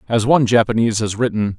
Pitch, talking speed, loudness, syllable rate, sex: 115 Hz, 190 wpm, -16 LUFS, 7.0 syllables/s, male